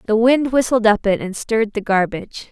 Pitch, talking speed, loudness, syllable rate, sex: 220 Hz, 215 wpm, -17 LUFS, 5.6 syllables/s, female